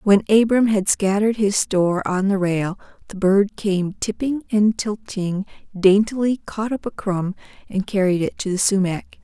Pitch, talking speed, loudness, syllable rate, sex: 200 Hz, 170 wpm, -20 LUFS, 4.4 syllables/s, female